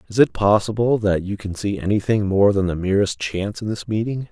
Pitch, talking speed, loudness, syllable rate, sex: 100 Hz, 220 wpm, -20 LUFS, 5.6 syllables/s, male